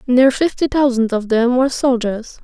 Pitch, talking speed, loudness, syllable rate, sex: 250 Hz, 170 wpm, -16 LUFS, 4.9 syllables/s, female